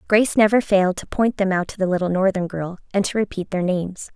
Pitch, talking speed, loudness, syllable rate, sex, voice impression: 195 Hz, 245 wpm, -20 LUFS, 6.3 syllables/s, female, slightly feminine, young, slightly bright, clear, slightly fluent, cute, slightly unique